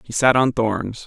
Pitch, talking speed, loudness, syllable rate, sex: 120 Hz, 225 wpm, -19 LUFS, 4.1 syllables/s, male